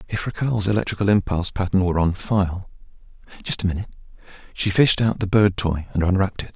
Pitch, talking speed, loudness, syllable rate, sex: 95 Hz, 175 wpm, -21 LUFS, 6.5 syllables/s, male